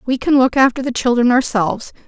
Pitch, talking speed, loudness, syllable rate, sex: 250 Hz, 200 wpm, -15 LUFS, 6.0 syllables/s, female